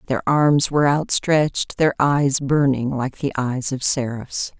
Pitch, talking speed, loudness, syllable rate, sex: 135 Hz, 155 wpm, -19 LUFS, 4.0 syllables/s, female